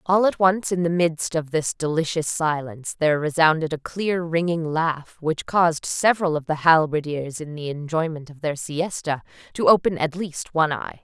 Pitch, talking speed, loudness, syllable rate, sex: 160 Hz, 185 wpm, -22 LUFS, 4.9 syllables/s, female